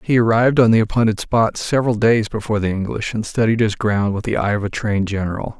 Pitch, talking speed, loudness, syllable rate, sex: 110 Hz, 235 wpm, -18 LUFS, 6.4 syllables/s, male